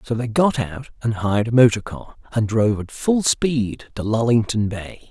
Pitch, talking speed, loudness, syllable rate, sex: 115 Hz, 200 wpm, -20 LUFS, 4.8 syllables/s, male